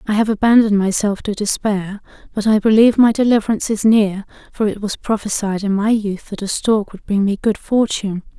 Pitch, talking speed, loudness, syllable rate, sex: 210 Hz, 200 wpm, -17 LUFS, 5.7 syllables/s, female